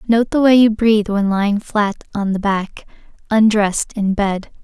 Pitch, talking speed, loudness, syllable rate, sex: 210 Hz, 180 wpm, -16 LUFS, 4.7 syllables/s, female